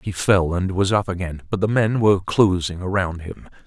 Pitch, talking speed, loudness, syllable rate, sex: 95 Hz, 215 wpm, -20 LUFS, 4.8 syllables/s, male